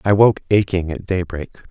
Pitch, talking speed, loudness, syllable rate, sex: 95 Hz, 175 wpm, -18 LUFS, 4.7 syllables/s, male